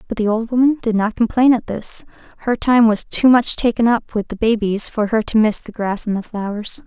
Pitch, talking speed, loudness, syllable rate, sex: 220 Hz, 245 wpm, -17 LUFS, 5.3 syllables/s, female